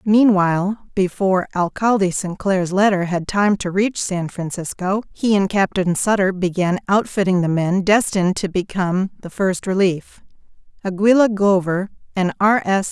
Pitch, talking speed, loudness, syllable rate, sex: 190 Hz, 140 wpm, -18 LUFS, 4.6 syllables/s, female